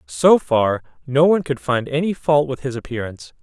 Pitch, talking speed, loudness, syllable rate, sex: 135 Hz, 195 wpm, -19 LUFS, 5.4 syllables/s, male